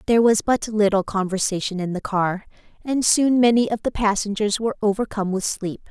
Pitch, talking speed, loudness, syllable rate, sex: 210 Hz, 185 wpm, -21 LUFS, 5.6 syllables/s, female